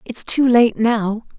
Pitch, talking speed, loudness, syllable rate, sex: 230 Hz, 175 wpm, -16 LUFS, 3.4 syllables/s, female